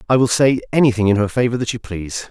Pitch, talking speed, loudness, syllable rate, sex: 115 Hz, 260 wpm, -17 LUFS, 7.0 syllables/s, male